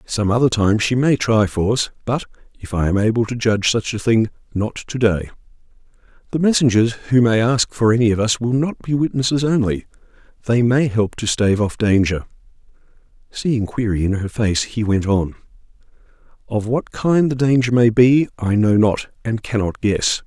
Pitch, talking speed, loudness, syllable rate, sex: 115 Hz, 180 wpm, -18 LUFS, 5.0 syllables/s, male